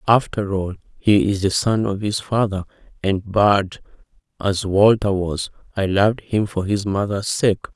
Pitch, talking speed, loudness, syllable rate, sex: 100 Hz, 165 wpm, -20 LUFS, 4.3 syllables/s, male